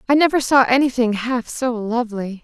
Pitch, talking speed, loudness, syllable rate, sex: 245 Hz, 195 wpm, -18 LUFS, 5.3 syllables/s, female